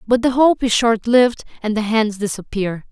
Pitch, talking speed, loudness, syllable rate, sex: 225 Hz, 185 wpm, -17 LUFS, 5.0 syllables/s, female